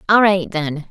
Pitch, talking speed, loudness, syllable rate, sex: 180 Hz, 200 wpm, -17 LUFS, 4.1 syllables/s, female